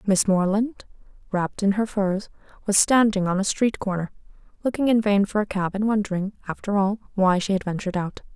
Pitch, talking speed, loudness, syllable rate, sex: 200 Hz, 195 wpm, -23 LUFS, 5.8 syllables/s, female